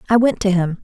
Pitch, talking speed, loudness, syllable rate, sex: 200 Hz, 285 wpm, -17 LUFS, 6.4 syllables/s, female